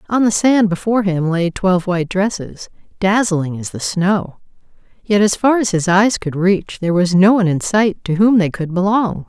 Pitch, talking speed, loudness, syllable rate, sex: 190 Hz, 205 wpm, -16 LUFS, 5.1 syllables/s, female